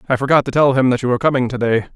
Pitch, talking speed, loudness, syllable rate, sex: 130 Hz, 340 wpm, -16 LUFS, 8.5 syllables/s, male